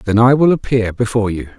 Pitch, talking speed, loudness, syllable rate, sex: 115 Hz, 225 wpm, -15 LUFS, 6.1 syllables/s, male